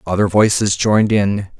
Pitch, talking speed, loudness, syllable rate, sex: 100 Hz, 150 wpm, -15 LUFS, 5.0 syllables/s, male